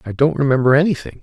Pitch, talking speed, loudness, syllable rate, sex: 140 Hz, 195 wpm, -16 LUFS, 7.2 syllables/s, male